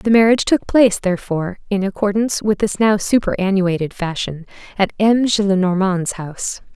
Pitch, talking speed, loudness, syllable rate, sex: 200 Hz, 140 wpm, -17 LUFS, 5.5 syllables/s, female